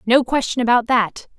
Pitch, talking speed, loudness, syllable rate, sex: 240 Hz, 175 wpm, -18 LUFS, 5.1 syllables/s, female